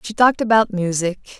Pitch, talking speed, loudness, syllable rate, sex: 205 Hz, 170 wpm, -18 LUFS, 6.3 syllables/s, female